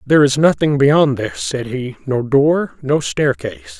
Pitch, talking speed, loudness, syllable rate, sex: 140 Hz, 175 wpm, -16 LUFS, 4.3 syllables/s, male